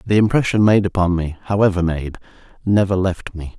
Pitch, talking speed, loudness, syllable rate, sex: 95 Hz, 170 wpm, -18 LUFS, 5.5 syllables/s, male